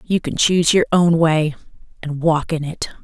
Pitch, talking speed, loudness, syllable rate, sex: 160 Hz, 200 wpm, -17 LUFS, 4.9 syllables/s, female